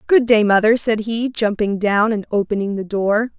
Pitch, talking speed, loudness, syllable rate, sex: 215 Hz, 195 wpm, -17 LUFS, 4.8 syllables/s, female